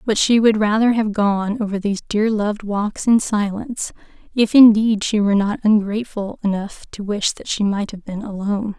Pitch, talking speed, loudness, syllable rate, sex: 210 Hz, 190 wpm, -18 LUFS, 5.2 syllables/s, female